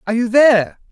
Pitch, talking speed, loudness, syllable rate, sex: 235 Hz, 195 wpm, -13 LUFS, 7.1 syllables/s, female